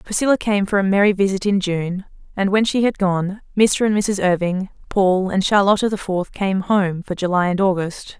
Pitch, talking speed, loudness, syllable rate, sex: 195 Hz, 205 wpm, -19 LUFS, 4.9 syllables/s, female